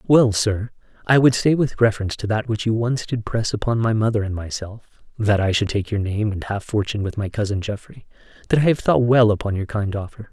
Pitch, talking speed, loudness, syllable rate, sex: 110 Hz, 225 wpm, -20 LUFS, 5.7 syllables/s, male